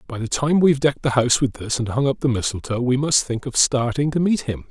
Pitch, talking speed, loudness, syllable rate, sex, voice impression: 130 Hz, 295 wpm, -20 LUFS, 6.2 syllables/s, male, masculine, middle-aged, tensed, slightly powerful, hard, clear, cool, slightly unique, wild, lively, strict, slightly intense, slightly sharp